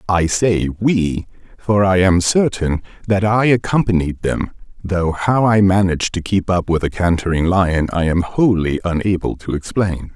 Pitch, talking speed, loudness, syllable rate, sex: 95 Hz, 165 wpm, -17 LUFS, 4.4 syllables/s, male